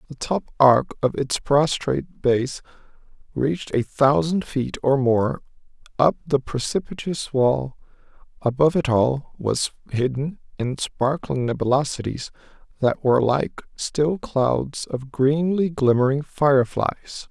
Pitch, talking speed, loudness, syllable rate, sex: 135 Hz, 120 wpm, -22 LUFS, 3.9 syllables/s, male